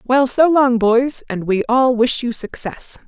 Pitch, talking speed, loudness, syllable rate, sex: 245 Hz, 195 wpm, -16 LUFS, 3.8 syllables/s, female